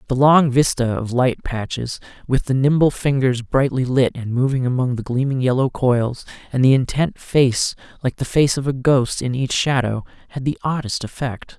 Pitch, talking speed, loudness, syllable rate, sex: 130 Hz, 185 wpm, -19 LUFS, 4.8 syllables/s, male